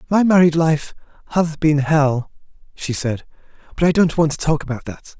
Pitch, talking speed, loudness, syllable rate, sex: 155 Hz, 185 wpm, -18 LUFS, 4.9 syllables/s, male